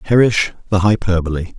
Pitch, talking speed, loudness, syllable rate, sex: 95 Hz, 115 wpm, -16 LUFS, 5.5 syllables/s, male